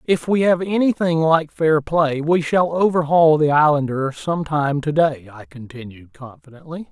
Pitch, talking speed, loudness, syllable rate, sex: 155 Hz, 155 wpm, -18 LUFS, 4.8 syllables/s, male